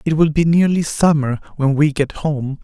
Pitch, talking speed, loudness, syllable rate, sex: 150 Hz, 205 wpm, -17 LUFS, 4.7 syllables/s, male